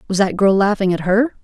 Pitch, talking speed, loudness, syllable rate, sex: 200 Hz, 250 wpm, -16 LUFS, 5.8 syllables/s, female